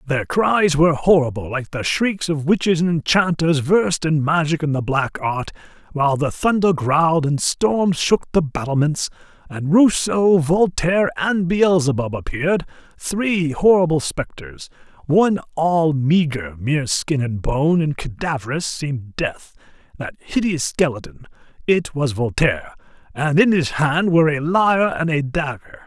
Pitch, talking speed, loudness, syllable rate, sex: 155 Hz, 145 wpm, -19 LUFS, 4.5 syllables/s, male